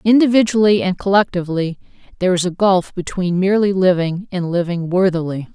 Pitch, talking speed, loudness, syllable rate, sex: 185 Hz, 140 wpm, -17 LUFS, 5.9 syllables/s, female